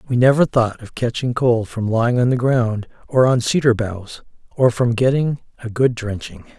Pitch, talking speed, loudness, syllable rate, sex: 120 Hz, 190 wpm, -18 LUFS, 4.9 syllables/s, male